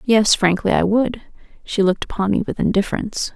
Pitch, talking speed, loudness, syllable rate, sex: 205 Hz, 180 wpm, -19 LUFS, 5.9 syllables/s, female